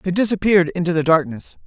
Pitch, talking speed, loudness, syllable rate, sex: 175 Hz, 180 wpm, -17 LUFS, 6.9 syllables/s, male